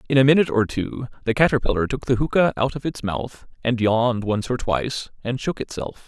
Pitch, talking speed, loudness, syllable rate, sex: 120 Hz, 215 wpm, -22 LUFS, 5.7 syllables/s, male